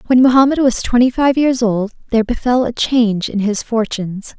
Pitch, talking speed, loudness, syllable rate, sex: 235 Hz, 190 wpm, -15 LUFS, 5.5 syllables/s, female